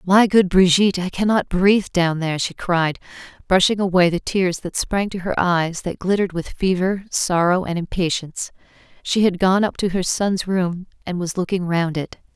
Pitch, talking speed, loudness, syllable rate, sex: 180 Hz, 185 wpm, -19 LUFS, 5.0 syllables/s, female